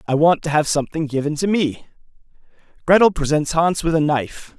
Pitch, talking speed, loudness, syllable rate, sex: 155 Hz, 185 wpm, -18 LUFS, 5.8 syllables/s, male